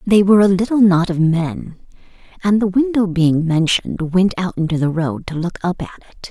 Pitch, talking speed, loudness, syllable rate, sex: 180 Hz, 210 wpm, -16 LUFS, 5.3 syllables/s, female